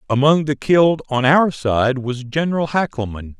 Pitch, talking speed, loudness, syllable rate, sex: 140 Hz, 160 wpm, -17 LUFS, 4.8 syllables/s, male